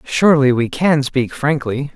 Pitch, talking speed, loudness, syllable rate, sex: 140 Hz, 155 wpm, -16 LUFS, 4.4 syllables/s, male